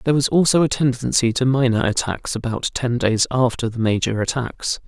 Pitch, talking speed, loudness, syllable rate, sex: 125 Hz, 185 wpm, -19 LUFS, 5.4 syllables/s, male